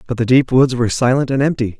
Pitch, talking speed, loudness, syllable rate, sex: 125 Hz, 270 wpm, -15 LUFS, 6.8 syllables/s, male